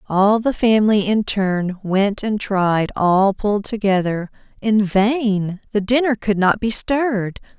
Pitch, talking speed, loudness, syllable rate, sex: 205 Hz, 150 wpm, -18 LUFS, 3.8 syllables/s, female